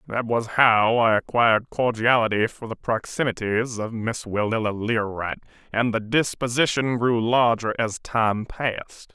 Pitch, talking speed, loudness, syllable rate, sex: 115 Hz, 140 wpm, -22 LUFS, 4.3 syllables/s, male